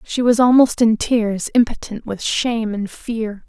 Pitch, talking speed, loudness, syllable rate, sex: 225 Hz, 170 wpm, -17 LUFS, 4.2 syllables/s, female